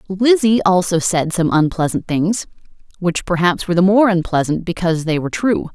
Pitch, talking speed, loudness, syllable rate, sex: 180 Hz, 155 wpm, -16 LUFS, 5.5 syllables/s, female